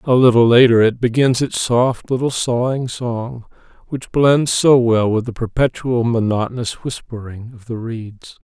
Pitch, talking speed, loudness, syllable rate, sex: 120 Hz, 155 wpm, -16 LUFS, 4.3 syllables/s, male